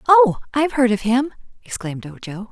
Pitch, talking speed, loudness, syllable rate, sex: 245 Hz, 165 wpm, -19 LUFS, 5.7 syllables/s, female